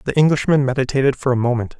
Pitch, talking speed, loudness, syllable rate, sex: 135 Hz, 200 wpm, -17 LUFS, 7.3 syllables/s, male